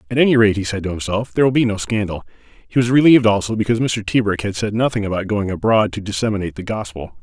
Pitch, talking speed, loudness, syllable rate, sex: 105 Hz, 240 wpm, -18 LUFS, 7.1 syllables/s, male